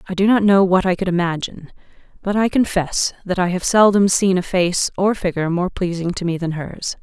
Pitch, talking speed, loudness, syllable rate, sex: 185 Hz, 220 wpm, -18 LUFS, 5.5 syllables/s, female